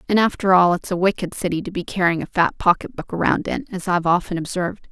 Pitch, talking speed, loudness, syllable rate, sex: 180 Hz, 230 wpm, -20 LUFS, 6.4 syllables/s, female